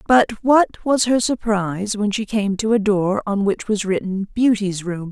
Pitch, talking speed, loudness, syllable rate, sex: 210 Hz, 200 wpm, -19 LUFS, 4.3 syllables/s, female